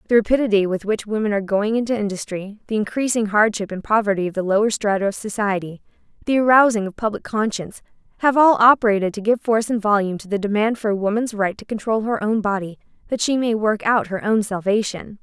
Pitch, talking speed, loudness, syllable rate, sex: 210 Hz, 205 wpm, -20 LUFS, 6.3 syllables/s, female